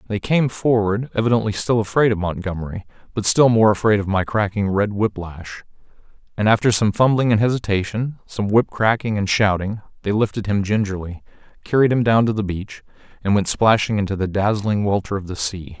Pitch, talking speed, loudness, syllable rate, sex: 105 Hz, 185 wpm, -19 LUFS, 5.5 syllables/s, male